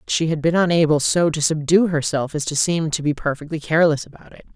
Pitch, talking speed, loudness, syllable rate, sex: 155 Hz, 225 wpm, -19 LUFS, 6.1 syllables/s, female